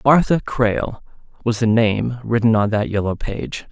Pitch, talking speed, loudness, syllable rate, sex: 115 Hz, 160 wpm, -19 LUFS, 4.6 syllables/s, male